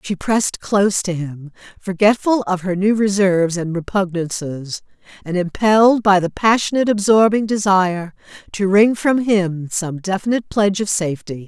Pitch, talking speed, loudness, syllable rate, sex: 195 Hz, 145 wpm, -17 LUFS, 5.1 syllables/s, female